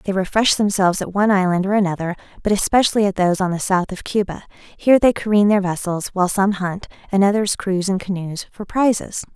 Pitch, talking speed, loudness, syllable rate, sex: 195 Hz, 205 wpm, -19 LUFS, 6.1 syllables/s, female